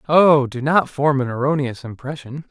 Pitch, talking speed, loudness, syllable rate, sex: 140 Hz, 170 wpm, -18 LUFS, 4.7 syllables/s, male